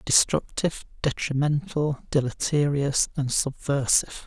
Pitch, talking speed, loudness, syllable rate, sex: 145 Hz, 70 wpm, -25 LUFS, 4.4 syllables/s, male